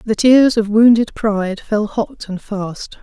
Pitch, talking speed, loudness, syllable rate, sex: 215 Hz, 180 wpm, -15 LUFS, 3.8 syllables/s, female